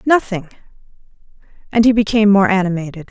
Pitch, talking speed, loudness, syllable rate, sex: 205 Hz, 115 wpm, -15 LUFS, 6.7 syllables/s, female